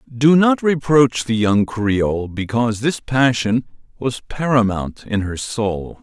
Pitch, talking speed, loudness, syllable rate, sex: 120 Hz, 140 wpm, -18 LUFS, 3.8 syllables/s, male